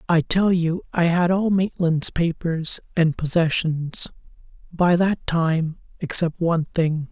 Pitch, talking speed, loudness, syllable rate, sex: 170 Hz, 125 wpm, -21 LUFS, 3.7 syllables/s, male